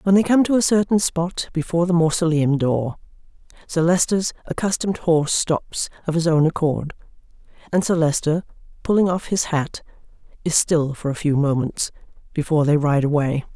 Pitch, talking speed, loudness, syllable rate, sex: 165 Hz, 165 wpm, -20 LUFS, 5.5 syllables/s, female